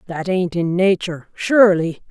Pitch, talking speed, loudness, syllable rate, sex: 180 Hz, 140 wpm, -17 LUFS, 4.4 syllables/s, female